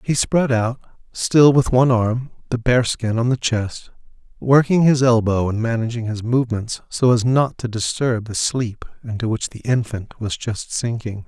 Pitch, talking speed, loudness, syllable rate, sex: 120 Hz, 180 wpm, -19 LUFS, 4.5 syllables/s, male